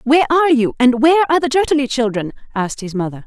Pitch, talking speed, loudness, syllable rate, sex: 265 Hz, 220 wpm, -16 LUFS, 7.3 syllables/s, female